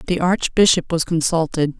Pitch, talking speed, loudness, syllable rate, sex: 165 Hz, 135 wpm, -18 LUFS, 5.0 syllables/s, female